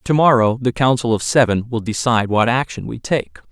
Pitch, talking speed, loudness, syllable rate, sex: 120 Hz, 205 wpm, -17 LUFS, 5.3 syllables/s, male